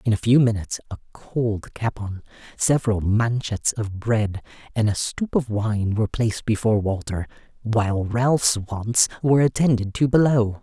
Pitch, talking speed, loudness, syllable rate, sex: 115 Hz, 150 wpm, -22 LUFS, 4.7 syllables/s, male